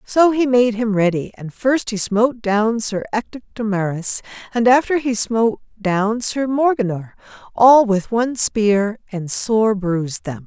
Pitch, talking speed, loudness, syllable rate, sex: 220 Hz, 165 wpm, -18 LUFS, 4.3 syllables/s, female